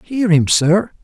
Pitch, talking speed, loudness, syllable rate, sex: 185 Hz, 175 wpm, -14 LUFS, 3.2 syllables/s, male